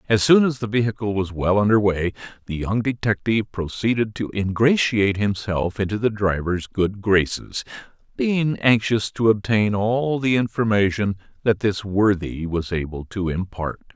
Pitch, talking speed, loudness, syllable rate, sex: 105 Hz, 150 wpm, -21 LUFS, 4.6 syllables/s, male